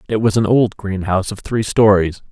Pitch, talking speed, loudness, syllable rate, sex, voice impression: 105 Hz, 235 wpm, -16 LUFS, 5.3 syllables/s, male, very masculine, middle-aged, very thick, tensed, slightly powerful, slightly bright, soft, muffled, fluent, slightly raspy, cool, very intellectual, slightly refreshing, sincere, calm, very mature, very friendly, reassuring, unique, elegant, very wild, very sweet, lively, kind, intense